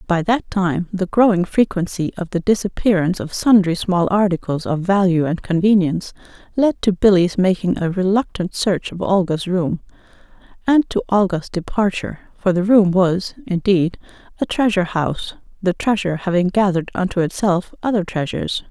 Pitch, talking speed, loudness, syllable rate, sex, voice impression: 185 Hz, 150 wpm, -18 LUFS, 5.2 syllables/s, female, feminine, very adult-like, slightly muffled, fluent, friendly, reassuring, sweet